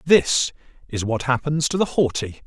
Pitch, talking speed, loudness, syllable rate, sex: 130 Hz, 170 wpm, -21 LUFS, 4.6 syllables/s, male